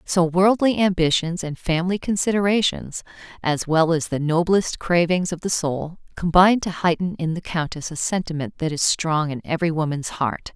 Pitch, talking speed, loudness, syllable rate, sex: 170 Hz, 170 wpm, -21 LUFS, 5.1 syllables/s, female